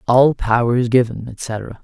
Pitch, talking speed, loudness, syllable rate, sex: 120 Hz, 165 wpm, -17 LUFS, 4.2 syllables/s, male